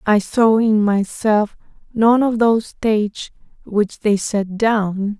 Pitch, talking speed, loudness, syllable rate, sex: 215 Hz, 140 wpm, -17 LUFS, 3.4 syllables/s, female